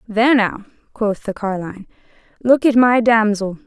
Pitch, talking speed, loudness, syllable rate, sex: 225 Hz, 145 wpm, -16 LUFS, 4.9 syllables/s, female